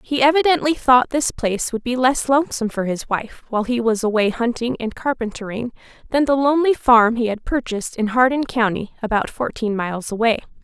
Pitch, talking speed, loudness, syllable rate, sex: 240 Hz, 185 wpm, -19 LUFS, 5.7 syllables/s, female